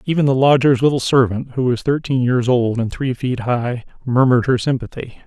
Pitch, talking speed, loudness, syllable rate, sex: 125 Hz, 195 wpm, -17 LUFS, 5.4 syllables/s, male